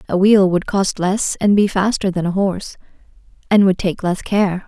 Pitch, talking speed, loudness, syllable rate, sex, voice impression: 190 Hz, 205 wpm, -16 LUFS, 4.8 syllables/s, female, feminine, slightly adult-like, clear, sincere, slightly friendly, slightly kind